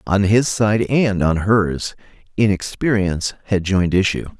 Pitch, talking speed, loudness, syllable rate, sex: 100 Hz, 135 wpm, -18 LUFS, 4.4 syllables/s, male